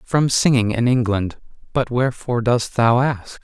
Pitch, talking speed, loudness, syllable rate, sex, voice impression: 120 Hz, 155 wpm, -19 LUFS, 4.7 syllables/s, male, masculine, adult-like, slightly thick, slightly cool, sincere, slightly calm, slightly kind